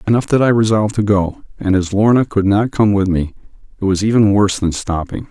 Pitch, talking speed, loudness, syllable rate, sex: 100 Hz, 225 wpm, -15 LUFS, 5.9 syllables/s, male